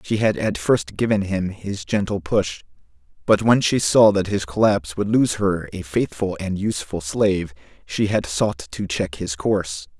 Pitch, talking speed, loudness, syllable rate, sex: 100 Hz, 185 wpm, -21 LUFS, 4.5 syllables/s, male